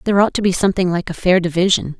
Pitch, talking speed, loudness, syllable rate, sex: 185 Hz, 270 wpm, -16 LUFS, 7.5 syllables/s, female